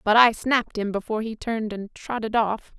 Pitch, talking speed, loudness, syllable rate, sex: 220 Hz, 215 wpm, -24 LUFS, 5.7 syllables/s, female